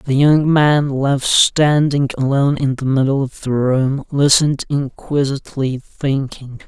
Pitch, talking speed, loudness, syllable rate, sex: 140 Hz, 135 wpm, -16 LUFS, 4.3 syllables/s, male